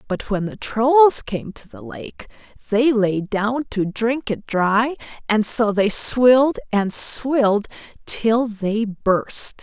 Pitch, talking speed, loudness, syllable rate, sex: 225 Hz, 150 wpm, -19 LUFS, 3.2 syllables/s, female